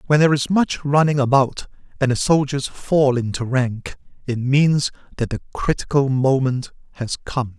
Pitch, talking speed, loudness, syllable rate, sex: 135 Hz, 160 wpm, -19 LUFS, 4.6 syllables/s, male